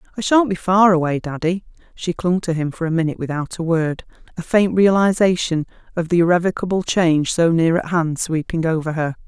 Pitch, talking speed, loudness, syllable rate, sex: 170 Hz, 195 wpm, -18 LUFS, 5.7 syllables/s, female